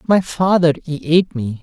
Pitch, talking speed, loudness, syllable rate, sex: 160 Hz, 185 wpm, -16 LUFS, 5.2 syllables/s, male